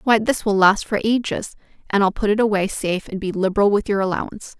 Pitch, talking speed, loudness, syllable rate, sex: 205 Hz, 235 wpm, -19 LUFS, 6.4 syllables/s, female